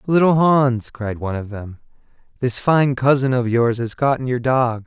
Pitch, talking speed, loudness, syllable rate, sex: 125 Hz, 185 wpm, -18 LUFS, 4.8 syllables/s, male